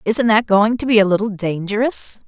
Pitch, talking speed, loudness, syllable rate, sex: 210 Hz, 210 wpm, -16 LUFS, 5.1 syllables/s, female